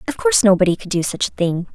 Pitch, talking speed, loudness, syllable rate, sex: 195 Hz, 275 wpm, -17 LUFS, 7.1 syllables/s, female